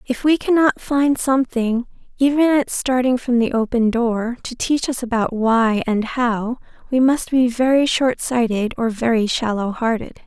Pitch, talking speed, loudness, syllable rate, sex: 245 Hz, 170 wpm, -18 LUFS, 4.4 syllables/s, female